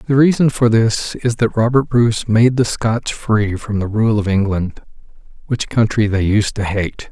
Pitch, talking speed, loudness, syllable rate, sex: 110 Hz, 195 wpm, -16 LUFS, 4.5 syllables/s, male